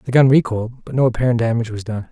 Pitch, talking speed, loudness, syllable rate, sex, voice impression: 120 Hz, 255 wpm, -18 LUFS, 8.1 syllables/s, male, very masculine, very middle-aged, very thick, tensed, slightly powerful, slightly bright, soft, muffled, slightly fluent, cool, intellectual, slightly refreshing, sincere, calm, mature, slightly friendly, reassuring, unique, slightly elegant, wild, slightly sweet, lively, slightly strict, slightly intense, slightly modest